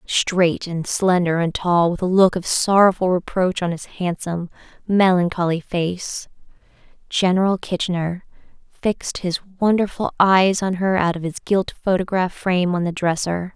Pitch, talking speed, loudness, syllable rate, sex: 180 Hz, 145 wpm, -20 LUFS, 4.6 syllables/s, female